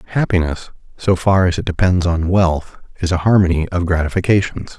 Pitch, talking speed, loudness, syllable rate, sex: 90 Hz, 165 wpm, -17 LUFS, 5.4 syllables/s, male